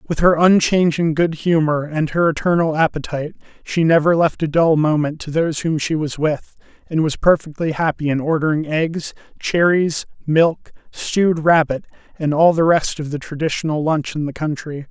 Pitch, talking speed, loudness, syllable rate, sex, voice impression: 160 Hz, 175 wpm, -18 LUFS, 5.0 syllables/s, male, very masculine, old, slightly thick, slightly tensed, slightly weak, slightly bright, soft, slightly muffled, slightly halting, slightly raspy, slightly cool, intellectual, slightly refreshing, sincere, calm, mature, friendly, slightly reassuring, unique, slightly elegant, wild, slightly sweet, lively, kind, modest